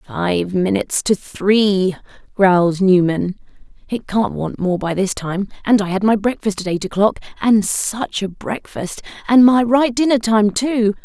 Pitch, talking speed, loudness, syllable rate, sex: 205 Hz, 170 wpm, -17 LUFS, 4.1 syllables/s, female